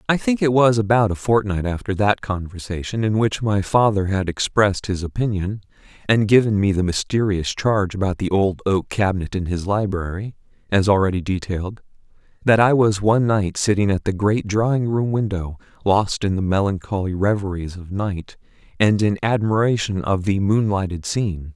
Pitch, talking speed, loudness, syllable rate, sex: 100 Hz, 170 wpm, -20 LUFS, 5.2 syllables/s, male